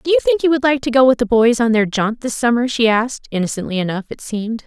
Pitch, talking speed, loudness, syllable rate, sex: 240 Hz, 285 wpm, -16 LUFS, 6.4 syllables/s, female